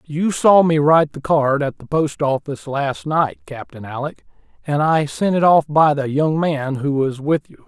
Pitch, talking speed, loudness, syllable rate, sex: 145 Hz, 210 wpm, -18 LUFS, 4.5 syllables/s, male